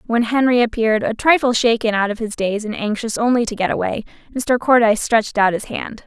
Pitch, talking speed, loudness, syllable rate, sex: 225 Hz, 220 wpm, -17 LUFS, 5.9 syllables/s, female